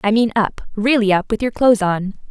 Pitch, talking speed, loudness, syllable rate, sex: 215 Hz, 210 wpm, -17 LUFS, 5.7 syllables/s, female